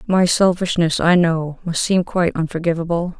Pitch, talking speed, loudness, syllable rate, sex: 170 Hz, 150 wpm, -18 LUFS, 5.1 syllables/s, female